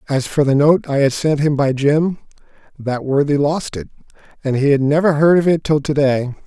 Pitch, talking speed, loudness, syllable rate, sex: 145 Hz, 225 wpm, -16 LUFS, 5.1 syllables/s, male